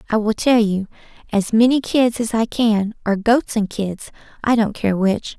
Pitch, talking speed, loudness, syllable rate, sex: 220 Hz, 200 wpm, -18 LUFS, 4.4 syllables/s, female